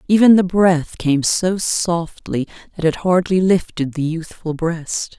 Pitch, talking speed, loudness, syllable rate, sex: 170 Hz, 150 wpm, -18 LUFS, 3.8 syllables/s, female